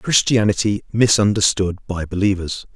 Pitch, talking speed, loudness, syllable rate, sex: 100 Hz, 85 wpm, -18 LUFS, 4.8 syllables/s, male